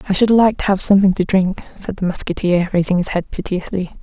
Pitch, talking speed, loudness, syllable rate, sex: 190 Hz, 225 wpm, -16 LUFS, 6.0 syllables/s, female